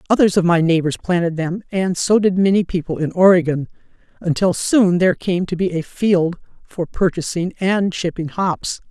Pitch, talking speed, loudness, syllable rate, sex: 180 Hz, 175 wpm, -18 LUFS, 4.9 syllables/s, female